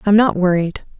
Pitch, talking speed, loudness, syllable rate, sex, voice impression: 195 Hz, 180 wpm, -16 LUFS, 5.3 syllables/s, female, very feminine, very adult-like, very thin, tensed, slightly powerful, bright, soft, slightly clear, fluent, slightly raspy, cute, very intellectual, refreshing, sincere, calm, very friendly, very reassuring, unique, very elegant, slightly wild, sweet, lively, kind, slightly modest, light